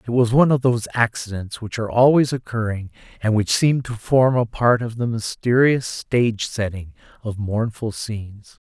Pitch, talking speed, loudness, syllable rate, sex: 115 Hz, 175 wpm, -20 LUFS, 4.9 syllables/s, male